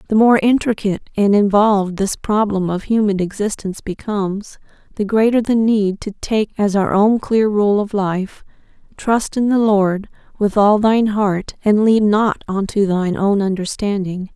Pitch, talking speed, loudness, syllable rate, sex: 205 Hz, 165 wpm, -17 LUFS, 4.6 syllables/s, female